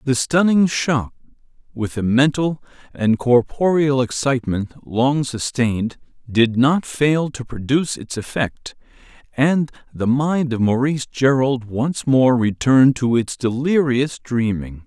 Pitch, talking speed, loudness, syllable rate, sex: 130 Hz, 115 wpm, -19 LUFS, 4.0 syllables/s, male